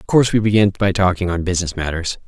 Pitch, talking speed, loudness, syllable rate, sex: 95 Hz, 235 wpm, -17 LUFS, 7.0 syllables/s, male